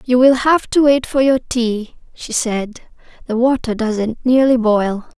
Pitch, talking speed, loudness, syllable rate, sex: 240 Hz, 175 wpm, -16 LUFS, 3.9 syllables/s, female